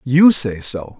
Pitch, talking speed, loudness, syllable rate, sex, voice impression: 130 Hz, 180 wpm, -15 LUFS, 3.4 syllables/s, male, very masculine, adult-like, slightly thick, cool, intellectual, slightly wild